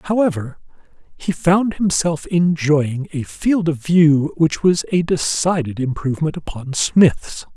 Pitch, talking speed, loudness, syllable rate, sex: 160 Hz, 125 wpm, -18 LUFS, 3.9 syllables/s, male